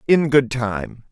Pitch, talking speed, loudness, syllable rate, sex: 125 Hz, 160 wpm, -19 LUFS, 3.2 syllables/s, male